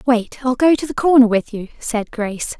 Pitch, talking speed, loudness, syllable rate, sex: 245 Hz, 230 wpm, -17 LUFS, 5.2 syllables/s, female